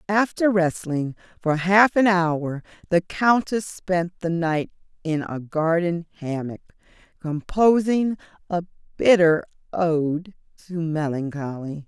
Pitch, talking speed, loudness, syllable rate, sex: 170 Hz, 105 wpm, -22 LUFS, 3.8 syllables/s, female